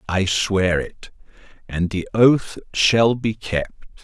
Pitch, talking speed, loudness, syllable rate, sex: 100 Hz, 120 wpm, -19 LUFS, 3.0 syllables/s, male